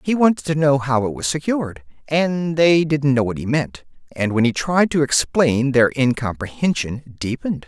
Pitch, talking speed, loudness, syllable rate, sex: 140 Hz, 190 wpm, -19 LUFS, 4.8 syllables/s, male